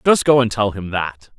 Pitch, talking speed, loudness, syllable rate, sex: 110 Hz, 260 wpm, -18 LUFS, 4.9 syllables/s, male